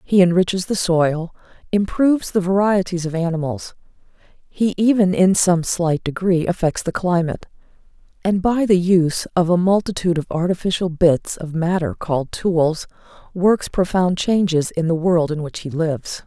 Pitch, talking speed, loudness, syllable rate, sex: 175 Hz, 155 wpm, -19 LUFS, 4.8 syllables/s, female